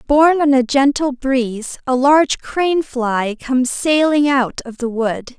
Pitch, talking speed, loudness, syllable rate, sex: 265 Hz, 165 wpm, -16 LUFS, 4.3 syllables/s, female